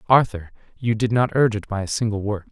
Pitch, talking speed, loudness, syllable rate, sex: 110 Hz, 240 wpm, -21 LUFS, 6.6 syllables/s, male